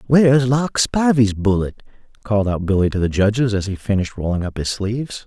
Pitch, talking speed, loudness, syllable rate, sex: 110 Hz, 195 wpm, -18 LUFS, 5.8 syllables/s, male